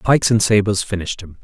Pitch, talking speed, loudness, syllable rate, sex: 100 Hz, 210 wpm, -17 LUFS, 6.6 syllables/s, male